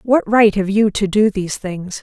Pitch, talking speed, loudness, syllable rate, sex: 205 Hz, 235 wpm, -16 LUFS, 4.7 syllables/s, female